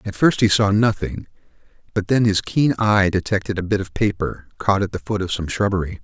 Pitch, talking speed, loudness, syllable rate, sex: 100 Hz, 220 wpm, -20 LUFS, 5.5 syllables/s, male